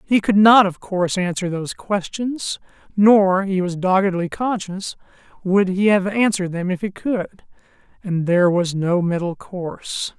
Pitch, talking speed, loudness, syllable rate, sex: 190 Hz, 155 wpm, -19 LUFS, 4.5 syllables/s, male